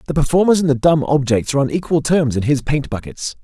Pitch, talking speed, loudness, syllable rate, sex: 145 Hz, 245 wpm, -17 LUFS, 6.2 syllables/s, male